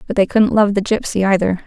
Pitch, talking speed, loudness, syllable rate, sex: 200 Hz, 250 wpm, -16 LUFS, 6.0 syllables/s, female